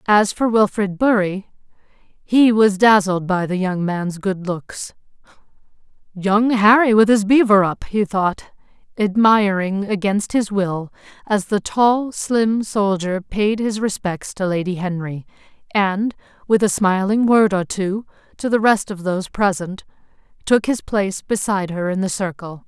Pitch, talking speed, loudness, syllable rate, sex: 200 Hz, 150 wpm, -18 LUFS, 4.1 syllables/s, female